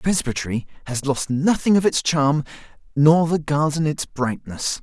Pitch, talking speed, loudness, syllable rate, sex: 145 Hz, 160 wpm, -21 LUFS, 5.0 syllables/s, male